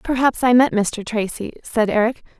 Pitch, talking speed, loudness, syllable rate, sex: 230 Hz, 175 wpm, -19 LUFS, 4.9 syllables/s, female